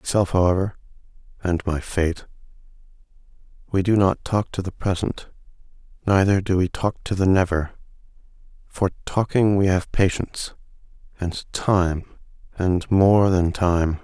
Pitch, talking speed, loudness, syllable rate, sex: 95 Hz, 125 wpm, -22 LUFS, 4.5 syllables/s, male